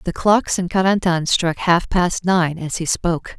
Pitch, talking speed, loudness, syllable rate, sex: 175 Hz, 195 wpm, -18 LUFS, 4.3 syllables/s, female